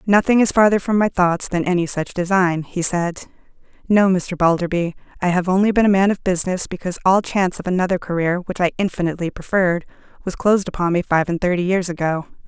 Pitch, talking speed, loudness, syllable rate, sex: 180 Hz, 200 wpm, -19 LUFS, 6.3 syllables/s, female